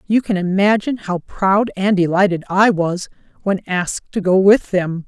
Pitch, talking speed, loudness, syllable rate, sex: 190 Hz, 175 wpm, -17 LUFS, 4.6 syllables/s, female